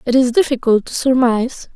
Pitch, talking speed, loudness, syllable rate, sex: 250 Hz, 170 wpm, -16 LUFS, 5.6 syllables/s, female